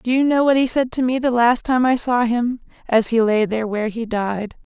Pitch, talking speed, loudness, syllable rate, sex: 240 Hz, 255 wpm, -19 LUFS, 5.3 syllables/s, female